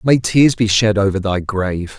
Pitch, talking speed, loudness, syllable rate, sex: 105 Hz, 210 wpm, -15 LUFS, 4.8 syllables/s, male